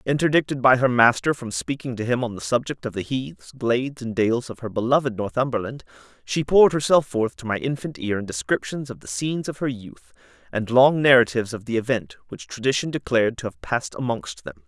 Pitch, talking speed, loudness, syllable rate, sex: 120 Hz, 210 wpm, -22 LUFS, 5.8 syllables/s, male